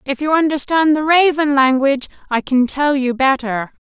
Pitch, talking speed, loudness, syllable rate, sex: 280 Hz, 170 wpm, -15 LUFS, 4.9 syllables/s, female